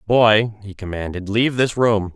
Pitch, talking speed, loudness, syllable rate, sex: 105 Hz, 165 wpm, -18 LUFS, 4.6 syllables/s, male